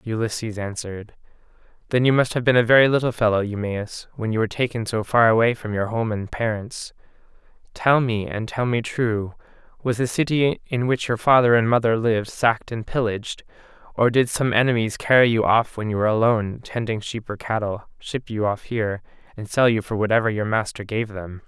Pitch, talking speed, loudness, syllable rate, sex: 115 Hz, 200 wpm, -21 LUFS, 5.6 syllables/s, male